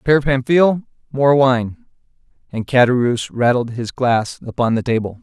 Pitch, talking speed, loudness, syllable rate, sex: 130 Hz, 140 wpm, -17 LUFS, 5.3 syllables/s, male